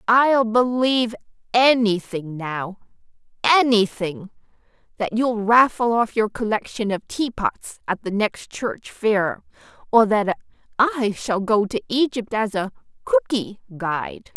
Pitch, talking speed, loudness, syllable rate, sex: 220 Hz, 115 wpm, -21 LUFS, 4.0 syllables/s, female